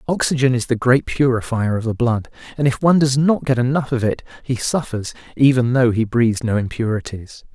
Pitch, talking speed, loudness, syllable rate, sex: 125 Hz, 200 wpm, -18 LUFS, 5.6 syllables/s, male